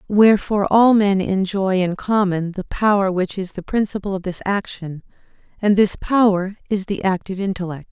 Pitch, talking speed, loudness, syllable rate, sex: 195 Hz, 165 wpm, -19 LUFS, 5.2 syllables/s, female